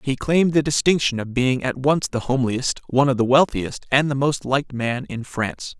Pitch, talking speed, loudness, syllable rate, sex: 130 Hz, 220 wpm, -20 LUFS, 5.4 syllables/s, male